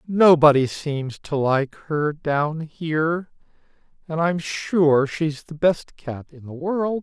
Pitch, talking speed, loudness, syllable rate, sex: 155 Hz, 145 wpm, -21 LUFS, 3.3 syllables/s, male